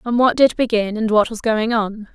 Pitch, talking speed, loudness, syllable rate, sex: 225 Hz, 250 wpm, -18 LUFS, 4.9 syllables/s, female